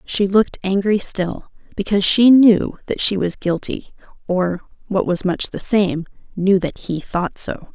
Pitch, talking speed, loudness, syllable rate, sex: 190 Hz, 170 wpm, -18 LUFS, 4.2 syllables/s, female